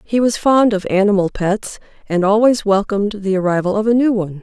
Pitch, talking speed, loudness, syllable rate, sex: 205 Hz, 205 wpm, -16 LUFS, 5.7 syllables/s, female